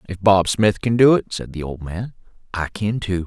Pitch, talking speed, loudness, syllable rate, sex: 100 Hz, 240 wpm, -19 LUFS, 4.7 syllables/s, male